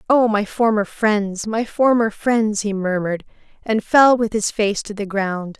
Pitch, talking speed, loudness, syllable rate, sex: 215 Hz, 180 wpm, -19 LUFS, 4.2 syllables/s, female